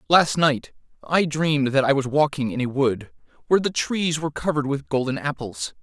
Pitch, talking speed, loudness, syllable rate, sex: 145 Hz, 195 wpm, -22 LUFS, 5.5 syllables/s, male